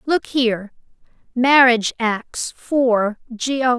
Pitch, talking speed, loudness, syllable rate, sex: 245 Hz, 95 wpm, -18 LUFS, 3.1 syllables/s, female